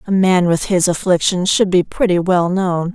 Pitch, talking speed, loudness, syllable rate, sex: 180 Hz, 185 wpm, -15 LUFS, 4.6 syllables/s, female